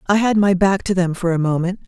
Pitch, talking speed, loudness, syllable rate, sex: 185 Hz, 290 wpm, -17 LUFS, 6.1 syllables/s, female